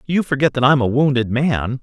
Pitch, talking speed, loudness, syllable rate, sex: 135 Hz, 230 wpm, -17 LUFS, 5.2 syllables/s, male